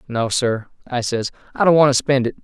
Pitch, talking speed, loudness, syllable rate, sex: 130 Hz, 245 wpm, -18 LUFS, 5.5 syllables/s, male